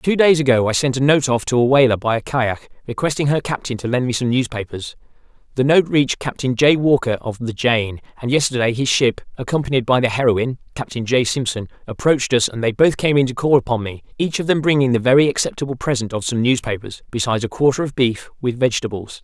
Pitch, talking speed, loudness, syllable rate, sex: 125 Hz, 220 wpm, -18 LUFS, 6.2 syllables/s, male